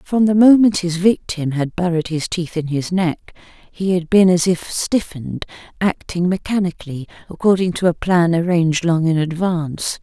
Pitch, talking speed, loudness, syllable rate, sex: 175 Hz, 170 wpm, -17 LUFS, 4.9 syllables/s, female